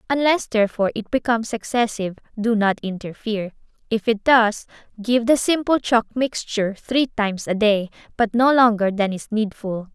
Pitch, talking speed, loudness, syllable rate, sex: 225 Hz, 155 wpm, -20 LUFS, 5.2 syllables/s, female